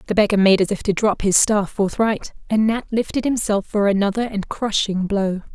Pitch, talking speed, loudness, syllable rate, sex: 205 Hz, 205 wpm, -19 LUFS, 5.1 syllables/s, female